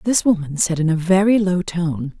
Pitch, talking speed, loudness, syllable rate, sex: 175 Hz, 220 wpm, -18 LUFS, 4.9 syllables/s, female